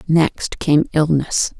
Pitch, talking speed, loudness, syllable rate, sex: 155 Hz, 115 wpm, -17 LUFS, 3.0 syllables/s, female